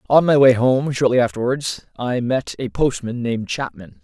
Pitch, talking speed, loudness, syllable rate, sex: 120 Hz, 180 wpm, -19 LUFS, 4.8 syllables/s, male